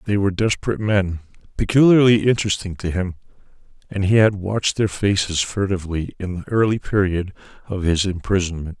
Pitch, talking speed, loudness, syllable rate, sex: 95 Hz, 150 wpm, -20 LUFS, 5.9 syllables/s, male